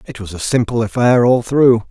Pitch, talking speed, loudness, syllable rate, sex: 115 Hz, 220 wpm, -14 LUFS, 5.0 syllables/s, male